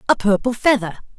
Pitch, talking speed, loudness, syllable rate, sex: 220 Hz, 150 wpm, -18 LUFS, 6.4 syllables/s, female